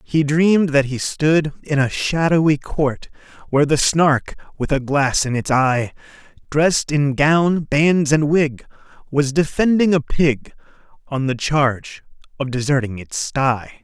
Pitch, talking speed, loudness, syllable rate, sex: 145 Hz, 150 wpm, -18 LUFS, 4.1 syllables/s, male